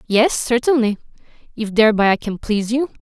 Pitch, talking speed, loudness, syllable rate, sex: 230 Hz, 160 wpm, -17 LUFS, 5.9 syllables/s, female